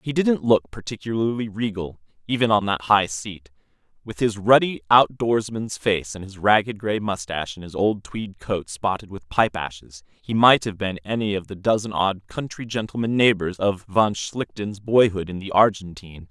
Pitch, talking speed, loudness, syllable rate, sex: 100 Hz, 175 wpm, -22 LUFS, 4.8 syllables/s, male